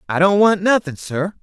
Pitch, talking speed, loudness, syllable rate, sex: 185 Hz, 210 wpm, -16 LUFS, 5.0 syllables/s, male